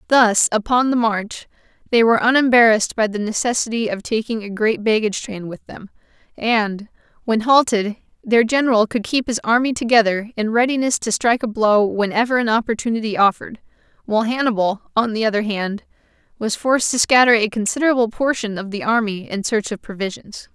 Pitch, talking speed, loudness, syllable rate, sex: 225 Hz, 170 wpm, -18 LUFS, 5.7 syllables/s, female